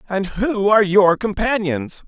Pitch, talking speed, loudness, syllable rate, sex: 200 Hz, 145 wpm, -17 LUFS, 4.2 syllables/s, male